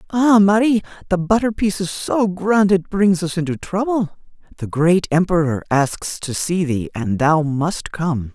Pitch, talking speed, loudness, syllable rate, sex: 175 Hz, 175 wpm, -18 LUFS, 4.2 syllables/s, female